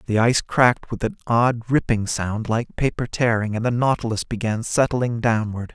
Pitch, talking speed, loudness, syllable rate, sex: 115 Hz, 175 wpm, -21 LUFS, 5.0 syllables/s, male